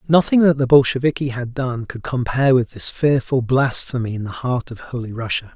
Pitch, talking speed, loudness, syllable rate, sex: 125 Hz, 195 wpm, -19 LUFS, 5.4 syllables/s, male